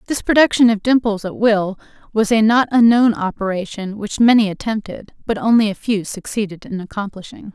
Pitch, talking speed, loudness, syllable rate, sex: 215 Hz, 165 wpm, -17 LUFS, 5.4 syllables/s, female